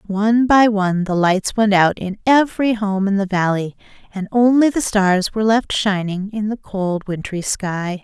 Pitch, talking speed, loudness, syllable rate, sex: 205 Hz, 185 wpm, -17 LUFS, 4.6 syllables/s, female